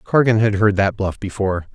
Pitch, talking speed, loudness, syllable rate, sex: 105 Hz, 205 wpm, -18 LUFS, 5.6 syllables/s, male